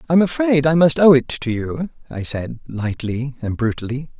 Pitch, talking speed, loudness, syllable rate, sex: 140 Hz, 185 wpm, -19 LUFS, 4.7 syllables/s, male